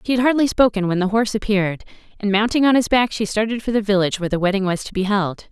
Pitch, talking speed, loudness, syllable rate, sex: 210 Hz, 270 wpm, -19 LUFS, 7.2 syllables/s, female